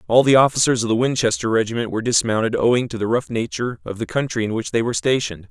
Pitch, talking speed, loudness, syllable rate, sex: 115 Hz, 240 wpm, -19 LUFS, 7.2 syllables/s, male